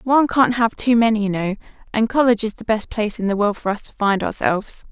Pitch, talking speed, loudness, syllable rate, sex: 220 Hz, 255 wpm, -19 LUFS, 6.5 syllables/s, female